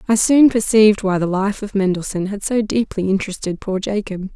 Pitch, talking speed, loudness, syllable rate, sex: 200 Hz, 195 wpm, -17 LUFS, 5.5 syllables/s, female